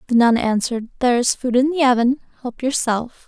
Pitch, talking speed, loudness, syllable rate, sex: 245 Hz, 200 wpm, -18 LUFS, 6.0 syllables/s, female